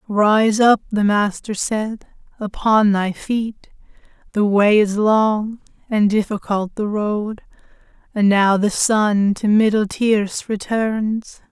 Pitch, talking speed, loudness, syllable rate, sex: 210 Hz, 125 wpm, -18 LUFS, 3.4 syllables/s, female